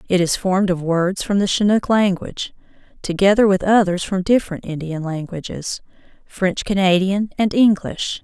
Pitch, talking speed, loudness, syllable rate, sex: 190 Hz, 145 wpm, -18 LUFS, 5.0 syllables/s, female